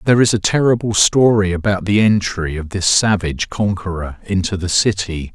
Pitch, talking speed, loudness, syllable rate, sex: 95 Hz, 170 wpm, -16 LUFS, 5.3 syllables/s, male